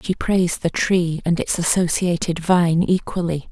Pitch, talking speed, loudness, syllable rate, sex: 175 Hz, 155 wpm, -19 LUFS, 4.4 syllables/s, female